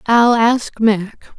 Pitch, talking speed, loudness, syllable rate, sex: 225 Hz, 130 wpm, -15 LUFS, 2.6 syllables/s, female